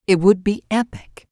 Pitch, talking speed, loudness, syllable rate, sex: 195 Hz, 180 wpm, -19 LUFS, 4.6 syllables/s, female